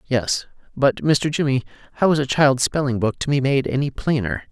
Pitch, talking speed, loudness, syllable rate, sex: 130 Hz, 200 wpm, -20 LUFS, 5.1 syllables/s, male